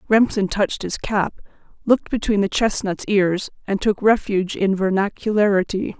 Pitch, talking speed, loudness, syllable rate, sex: 205 Hz, 140 wpm, -20 LUFS, 5.1 syllables/s, female